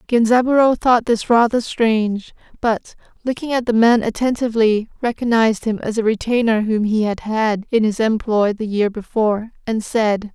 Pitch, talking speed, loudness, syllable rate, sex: 225 Hz, 160 wpm, -18 LUFS, 5.0 syllables/s, female